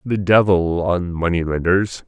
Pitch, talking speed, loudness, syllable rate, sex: 90 Hz, 115 wpm, -18 LUFS, 4.1 syllables/s, male